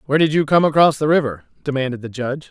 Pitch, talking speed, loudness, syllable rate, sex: 145 Hz, 240 wpm, -18 LUFS, 7.3 syllables/s, male